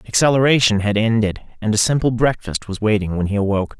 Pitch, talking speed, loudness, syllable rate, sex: 110 Hz, 190 wpm, -18 LUFS, 6.3 syllables/s, male